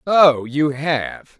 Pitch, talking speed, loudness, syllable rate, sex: 145 Hz, 130 wpm, -17 LUFS, 2.4 syllables/s, male